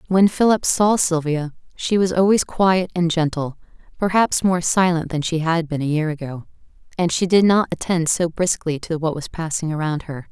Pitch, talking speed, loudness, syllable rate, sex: 170 Hz, 190 wpm, -19 LUFS, 4.9 syllables/s, female